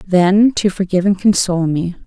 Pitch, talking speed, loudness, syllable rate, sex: 190 Hz, 175 wpm, -15 LUFS, 5.4 syllables/s, female